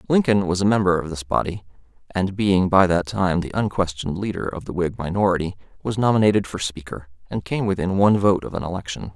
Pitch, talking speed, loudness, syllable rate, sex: 95 Hz, 205 wpm, -21 LUFS, 6.1 syllables/s, male